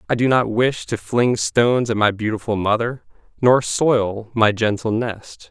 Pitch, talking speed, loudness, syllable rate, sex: 115 Hz, 175 wpm, -19 LUFS, 4.3 syllables/s, male